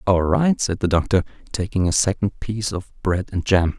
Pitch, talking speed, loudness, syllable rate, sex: 95 Hz, 205 wpm, -21 LUFS, 5.2 syllables/s, male